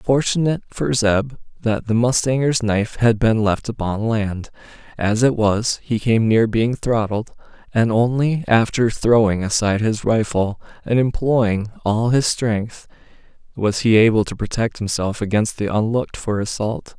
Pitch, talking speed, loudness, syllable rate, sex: 110 Hz, 150 wpm, -19 LUFS, 4.4 syllables/s, male